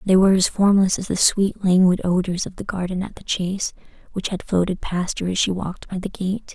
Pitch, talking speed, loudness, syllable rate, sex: 185 Hz, 240 wpm, -21 LUFS, 5.6 syllables/s, female